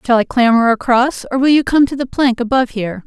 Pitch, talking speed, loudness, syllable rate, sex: 245 Hz, 255 wpm, -14 LUFS, 6.3 syllables/s, female